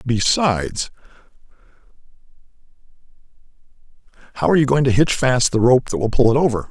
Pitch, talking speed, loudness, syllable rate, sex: 125 Hz, 135 wpm, -17 LUFS, 6.1 syllables/s, male